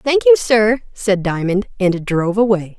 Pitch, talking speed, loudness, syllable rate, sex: 205 Hz, 170 wpm, -16 LUFS, 4.5 syllables/s, female